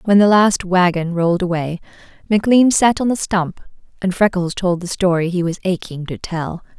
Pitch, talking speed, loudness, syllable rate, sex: 185 Hz, 185 wpm, -17 LUFS, 5.1 syllables/s, female